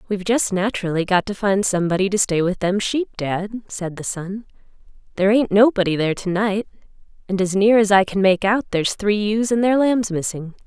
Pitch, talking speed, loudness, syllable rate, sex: 200 Hz, 210 wpm, -19 LUFS, 5.6 syllables/s, female